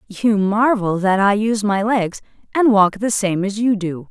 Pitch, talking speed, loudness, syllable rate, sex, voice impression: 205 Hz, 205 wpm, -17 LUFS, 4.4 syllables/s, female, very feminine, very middle-aged, very thin, very tensed, powerful, slightly weak, very bright, slightly soft, clear, fluent, slightly raspy, very cute, intellectual, refreshing, sincere, slightly calm, very friendly, very reassuring, unique, slightly elegant, wild, sweet, lively, slightly strict, slightly sharp